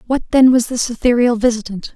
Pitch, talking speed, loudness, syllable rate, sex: 240 Hz, 185 wpm, -15 LUFS, 5.9 syllables/s, female